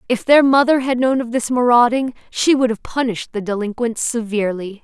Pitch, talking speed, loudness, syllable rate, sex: 240 Hz, 185 wpm, -17 LUFS, 5.6 syllables/s, female